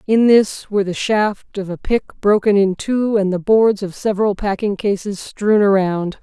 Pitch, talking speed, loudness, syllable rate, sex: 205 Hz, 195 wpm, -17 LUFS, 4.4 syllables/s, female